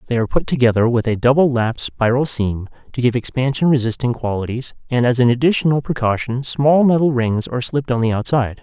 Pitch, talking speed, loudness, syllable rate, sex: 125 Hz, 195 wpm, -17 LUFS, 6.2 syllables/s, male